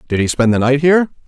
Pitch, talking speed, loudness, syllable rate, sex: 135 Hz, 280 wpm, -14 LUFS, 7.3 syllables/s, male